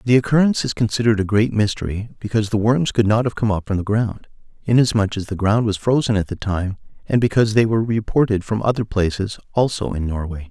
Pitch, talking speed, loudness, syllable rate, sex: 110 Hz, 215 wpm, -19 LUFS, 6.3 syllables/s, male